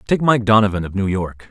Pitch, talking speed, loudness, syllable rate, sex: 105 Hz, 240 wpm, -17 LUFS, 5.8 syllables/s, male